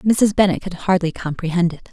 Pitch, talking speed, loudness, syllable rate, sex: 180 Hz, 190 wpm, -19 LUFS, 5.4 syllables/s, female